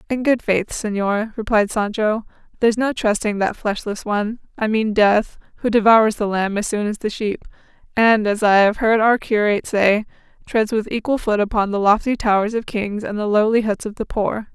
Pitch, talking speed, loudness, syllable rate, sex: 215 Hz, 200 wpm, -19 LUFS, 5.1 syllables/s, female